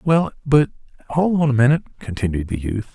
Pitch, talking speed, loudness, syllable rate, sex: 130 Hz, 185 wpm, -19 LUFS, 5.2 syllables/s, male